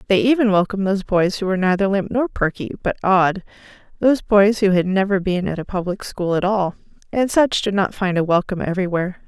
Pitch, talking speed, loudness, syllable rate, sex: 195 Hz, 205 wpm, -19 LUFS, 6.1 syllables/s, female